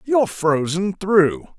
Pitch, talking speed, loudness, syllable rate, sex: 170 Hz, 115 wpm, -19 LUFS, 3.6 syllables/s, male